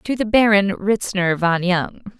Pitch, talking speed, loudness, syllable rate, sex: 200 Hz, 165 wpm, -18 LUFS, 4.0 syllables/s, female